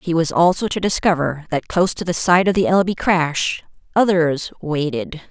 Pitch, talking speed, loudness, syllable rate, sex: 170 Hz, 190 wpm, -18 LUFS, 4.9 syllables/s, female